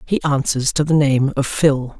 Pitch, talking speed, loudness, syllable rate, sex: 140 Hz, 210 wpm, -17 LUFS, 4.4 syllables/s, female